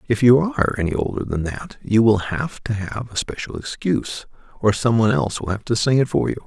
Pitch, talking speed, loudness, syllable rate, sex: 110 Hz, 240 wpm, -20 LUFS, 5.8 syllables/s, male